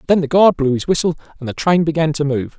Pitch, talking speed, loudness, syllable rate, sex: 155 Hz, 280 wpm, -16 LUFS, 6.5 syllables/s, male